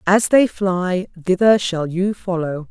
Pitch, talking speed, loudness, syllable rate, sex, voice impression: 185 Hz, 155 wpm, -18 LUFS, 3.7 syllables/s, female, very feminine, very young, tensed, powerful, very bright, soft, very clear, very fluent, very cute, slightly intellectual, very refreshing, sincere, calm, friendly, slightly reassuring, very unique, slightly elegant, wild, sweet, lively, slightly kind, very sharp